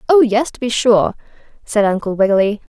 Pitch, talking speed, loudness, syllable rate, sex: 225 Hz, 175 wpm, -15 LUFS, 5.7 syllables/s, female